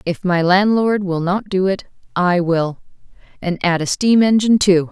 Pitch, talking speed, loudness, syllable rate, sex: 185 Hz, 185 wpm, -17 LUFS, 4.6 syllables/s, female